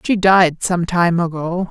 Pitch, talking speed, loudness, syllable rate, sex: 175 Hz, 175 wpm, -16 LUFS, 3.7 syllables/s, female